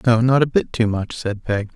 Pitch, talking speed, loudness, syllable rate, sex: 115 Hz, 275 wpm, -19 LUFS, 4.9 syllables/s, male